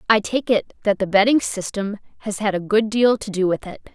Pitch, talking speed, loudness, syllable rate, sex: 205 Hz, 245 wpm, -20 LUFS, 5.3 syllables/s, female